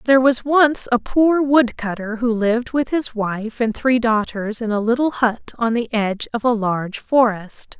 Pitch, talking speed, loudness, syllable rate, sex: 235 Hz, 190 wpm, -19 LUFS, 4.5 syllables/s, female